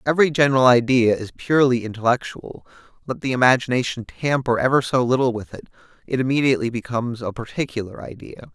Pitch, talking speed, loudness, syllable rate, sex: 125 Hz, 145 wpm, -20 LUFS, 6.4 syllables/s, male